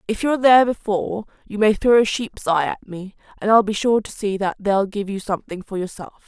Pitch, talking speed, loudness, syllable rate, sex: 205 Hz, 240 wpm, -20 LUFS, 5.9 syllables/s, female